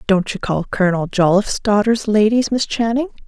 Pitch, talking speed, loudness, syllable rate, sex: 210 Hz, 165 wpm, -17 LUFS, 5.4 syllables/s, female